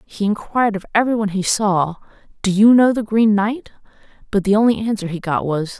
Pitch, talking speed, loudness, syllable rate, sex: 205 Hz, 195 wpm, -17 LUFS, 5.7 syllables/s, female